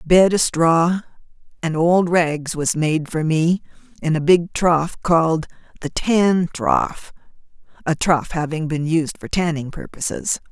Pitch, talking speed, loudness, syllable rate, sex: 165 Hz, 155 wpm, -19 LUFS, 2.9 syllables/s, female